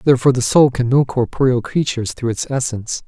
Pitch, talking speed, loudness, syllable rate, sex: 125 Hz, 195 wpm, -17 LUFS, 6.5 syllables/s, male